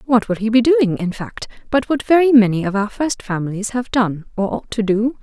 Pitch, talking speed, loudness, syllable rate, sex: 225 Hz, 240 wpm, -17 LUFS, 5.3 syllables/s, female